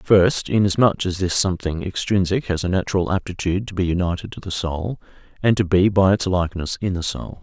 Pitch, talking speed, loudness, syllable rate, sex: 95 Hz, 200 wpm, -20 LUFS, 5.8 syllables/s, male